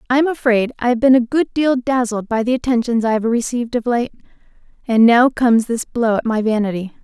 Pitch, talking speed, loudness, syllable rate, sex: 235 Hz, 220 wpm, -16 LUFS, 5.8 syllables/s, female